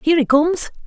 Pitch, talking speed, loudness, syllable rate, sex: 305 Hz, 205 wpm, -17 LUFS, 7.7 syllables/s, female